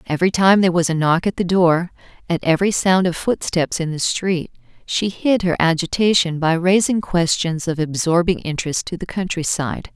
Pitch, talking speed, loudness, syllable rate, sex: 175 Hz, 180 wpm, -18 LUFS, 5.3 syllables/s, female